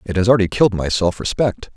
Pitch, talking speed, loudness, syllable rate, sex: 100 Hz, 240 wpm, -17 LUFS, 6.8 syllables/s, male